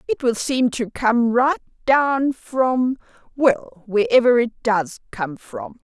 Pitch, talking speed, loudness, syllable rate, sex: 240 Hz, 130 wpm, -19 LUFS, 3.4 syllables/s, female